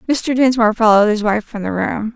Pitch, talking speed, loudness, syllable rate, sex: 225 Hz, 225 wpm, -15 LUFS, 6.0 syllables/s, female